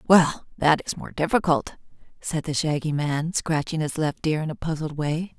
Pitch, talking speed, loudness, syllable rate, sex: 155 Hz, 190 wpm, -24 LUFS, 4.8 syllables/s, female